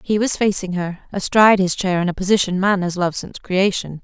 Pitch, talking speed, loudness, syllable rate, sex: 190 Hz, 210 wpm, -18 LUFS, 6.0 syllables/s, female